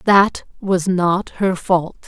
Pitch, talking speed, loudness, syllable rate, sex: 185 Hz, 145 wpm, -18 LUFS, 2.8 syllables/s, female